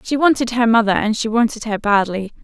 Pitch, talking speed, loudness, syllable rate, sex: 225 Hz, 220 wpm, -17 LUFS, 5.8 syllables/s, female